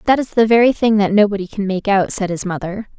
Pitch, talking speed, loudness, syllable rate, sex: 205 Hz, 260 wpm, -16 LUFS, 6.1 syllables/s, female